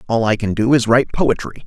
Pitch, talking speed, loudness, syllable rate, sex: 120 Hz, 255 wpm, -16 LUFS, 6.3 syllables/s, male